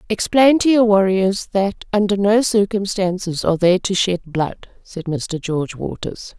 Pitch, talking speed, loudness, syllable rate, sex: 195 Hz, 160 wpm, -18 LUFS, 4.3 syllables/s, female